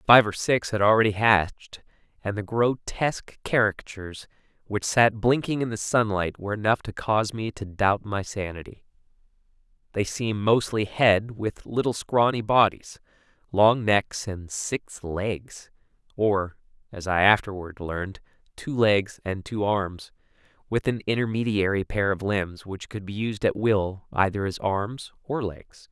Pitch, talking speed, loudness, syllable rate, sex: 105 Hz, 150 wpm, -25 LUFS, 4.4 syllables/s, male